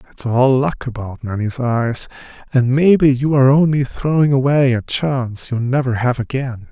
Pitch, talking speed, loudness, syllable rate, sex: 130 Hz, 170 wpm, -16 LUFS, 4.8 syllables/s, male